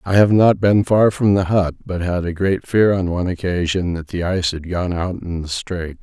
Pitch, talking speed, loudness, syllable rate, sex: 90 Hz, 250 wpm, -18 LUFS, 4.9 syllables/s, male